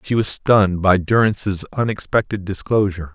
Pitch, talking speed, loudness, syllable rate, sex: 100 Hz, 135 wpm, -18 LUFS, 5.3 syllables/s, male